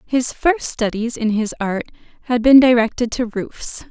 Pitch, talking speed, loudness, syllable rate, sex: 235 Hz, 170 wpm, -18 LUFS, 4.3 syllables/s, female